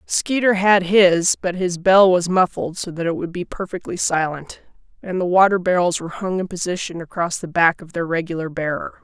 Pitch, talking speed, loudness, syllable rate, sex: 180 Hz, 200 wpm, -19 LUFS, 5.2 syllables/s, female